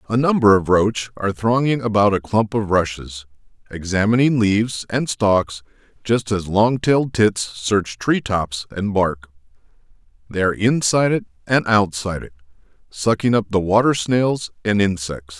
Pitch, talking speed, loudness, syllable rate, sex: 105 Hz, 150 wpm, -19 LUFS, 4.7 syllables/s, male